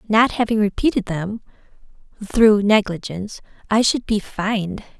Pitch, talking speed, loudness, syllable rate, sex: 210 Hz, 120 wpm, -19 LUFS, 4.7 syllables/s, female